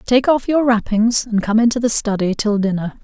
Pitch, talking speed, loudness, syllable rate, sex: 225 Hz, 220 wpm, -16 LUFS, 5.2 syllables/s, female